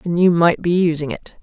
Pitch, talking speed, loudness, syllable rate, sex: 165 Hz, 255 wpm, -16 LUFS, 5.4 syllables/s, female